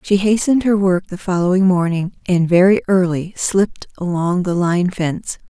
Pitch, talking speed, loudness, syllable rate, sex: 185 Hz, 165 wpm, -17 LUFS, 5.0 syllables/s, female